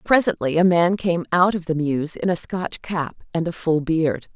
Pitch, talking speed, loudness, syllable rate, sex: 170 Hz, 220 wpm, -21 LUFS, 4.5 syllables/s, female